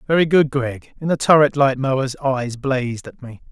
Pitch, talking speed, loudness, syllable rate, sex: 135 Hz, 205 wpm, -18 LUFS, 4.8 syllables/s, male